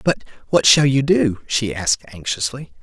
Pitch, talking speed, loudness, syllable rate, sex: 125 Hz, 150 wpm, -18 LUFS, 4.7 syllables/s, male